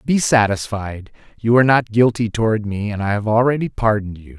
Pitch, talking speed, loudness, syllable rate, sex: 110 Hz, 190 wpm, -17 LUFS, 5.7 syllables/s, male